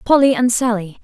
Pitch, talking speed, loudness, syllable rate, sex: 235 Hz, 175 wpm, -15 LUFS, 5.4 syllables/s, female